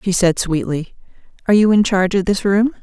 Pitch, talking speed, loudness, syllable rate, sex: 195 Hz, 210 wpm, -16 LUFS, 6.2 syllables/s, female